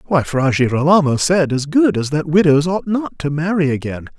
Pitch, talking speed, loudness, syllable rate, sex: 155 Hz, 200 wpm, -16 LUFS, 5.1 syllables/s, male